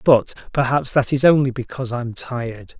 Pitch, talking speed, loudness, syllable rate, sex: 125 Hz, 170 wpm, -20 LUFS, 5.2 syllables/s, male